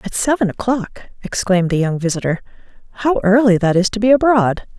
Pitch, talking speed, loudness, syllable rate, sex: 210 Hz, 175 wpm, -16 LUFS, 5.7 syllables/s, female